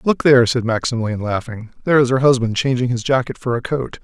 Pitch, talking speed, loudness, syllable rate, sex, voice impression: 125 Hz, 225 wpm, -17 LUFS, 6.3 syllables/s, male, very masculine, very middle-aged, very thick, tensed, very powerful, dark, soft, muffled, fluent, raspy, cool, very intellectual, refreshing, sincere, calm, very mature, very friendly, very reassuring, very unique, elegant, slightly wild, sweet, lively, kind, slightly modest